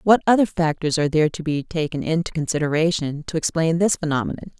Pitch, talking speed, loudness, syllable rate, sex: 160 Hz, 185 wpm, -21 LUFS, 6.6 syllables/s, female